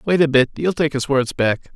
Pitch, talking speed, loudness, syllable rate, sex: 145 Hz, 275 wpm, -18 LUFS, 5.2 syllables/s, male